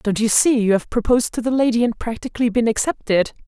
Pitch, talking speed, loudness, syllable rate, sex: 230 Hz, 225 wpm, -19 LUFS, 6.3 syllables/s, female